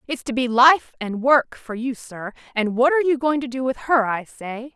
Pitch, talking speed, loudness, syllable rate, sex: 250 Hz, 250 wpm, -20 LUFS, 4.8 syllables/s, female